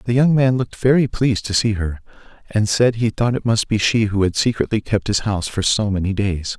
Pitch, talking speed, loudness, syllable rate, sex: 110 Hz, 245 wpm, -18 LUFS, 5.6 syllables/s, male